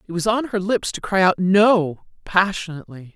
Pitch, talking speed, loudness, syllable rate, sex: 190 Hz, 190 wpm, -19 LUFS, 5.1 syllables/s, female